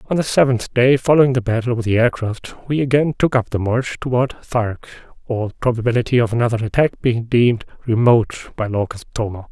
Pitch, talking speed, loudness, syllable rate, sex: 120 Hz, 190 wpm, -18 LUFS, 5.9 syllables/s, male